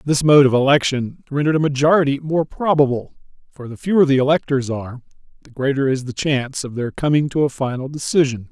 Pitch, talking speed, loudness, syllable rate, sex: 140 Hz, 190 wpm, -18 LUFS, 6.1 syllables/s, male